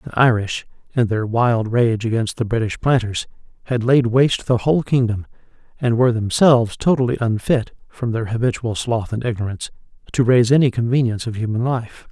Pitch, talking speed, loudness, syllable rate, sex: 120 Hz, 170 wpm, -19 LUFS, 5.7 syllables/s, male